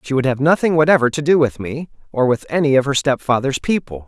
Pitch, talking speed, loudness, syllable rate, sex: 140 Hz, 235 wpm, -17 LUFS, 6.1 syllables/s, male